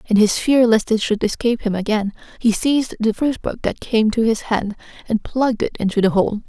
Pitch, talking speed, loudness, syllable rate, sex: 225 Hz, 230 wpm, -19 LUFS, 5.5 syllables/s, female